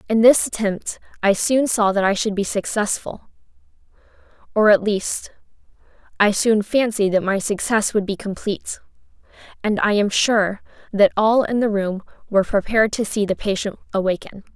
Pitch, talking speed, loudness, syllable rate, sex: 210 Hz, 150 wpm, -19 LUFS, 5.0 syllables/s, female